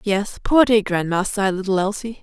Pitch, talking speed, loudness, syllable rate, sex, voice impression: 200 Hz, 190 wpm, -19 LUFS, 5.5 syllables/s, female, very feminine, slightly young, slightly adult-like, very thin, very tensed, powerful, bright, hard, very clear, fluent, slightly raspy, slightly cute, cool, intellectual, very refreshing, sincere, calm, friendly, reassuring, very unique, slightly elegant, wild, slightly sweet, lively, strict, slightly intense, slightly sharp